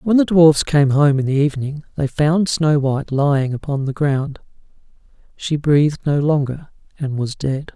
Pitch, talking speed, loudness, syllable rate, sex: 145 Hz, 180 wpm, -17 LUFS, 4.8 syllables/s, male